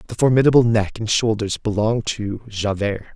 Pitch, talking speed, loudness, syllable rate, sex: 110 Hz, 150 wpm, -19 LUFS, 5.4 syllables/s, male